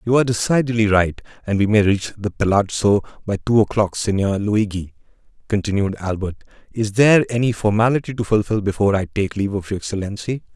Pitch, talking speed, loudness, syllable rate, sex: 105 Hz, 170 wpm, -19 LUFS, 6.1 syllables/s, male